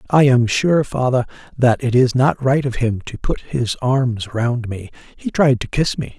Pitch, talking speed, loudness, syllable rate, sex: 125 Hz, 205 wpm, -18 LUFS, 4.3 syllables/s, male